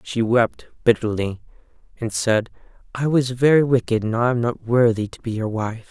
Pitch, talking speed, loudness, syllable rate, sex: 120 Hz, 185 wpm, -20 LUFS, 4.9 syllables/s, male